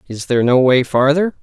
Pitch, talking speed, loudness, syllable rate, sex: 135 Hz, 210 wpm, -14 LUFS, 5.6 syllables/s, male